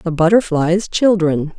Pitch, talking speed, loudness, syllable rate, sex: 175 Hz, 115 wpm, -15 LUFS, 3.9 syllables/s, female